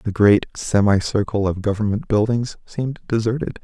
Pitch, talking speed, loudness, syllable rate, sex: 110 Hz, 150 wpm, -20 LUFS, 5.1 syllables/s, male